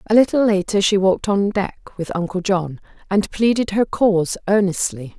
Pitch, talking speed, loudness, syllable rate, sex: 195 Hz, 175 wpm, -19 LUFS, 5.0 syllables/s, female